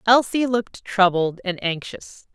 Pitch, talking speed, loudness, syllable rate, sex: 205 Hz, 130 wpm, -21 LUFS, 4.2 syllables/s, female